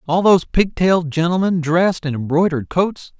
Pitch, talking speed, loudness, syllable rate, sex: 170 Hz, 150 wpm, -17 LUFS, 5.7 syllables/s, male